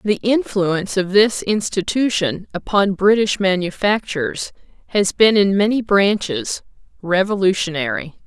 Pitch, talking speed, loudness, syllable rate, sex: 200 Hz, 100 wpm, -18 LUFS, 4.4 syllables/s, female